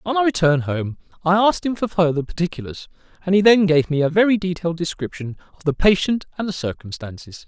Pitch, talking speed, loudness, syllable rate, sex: 175 Hz, 200 wpm, -19 LUFS, 6.1 syllables/s, male